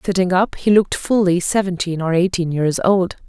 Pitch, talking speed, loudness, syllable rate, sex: 185 Hz, 185 wpm, -17 LUFS, 5.3 syllables/s, female